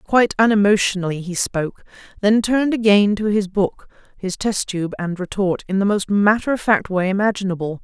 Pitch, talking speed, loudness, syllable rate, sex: 200 Hz, 175 wpm, -19 LUFS, 5.4 syllables/s, female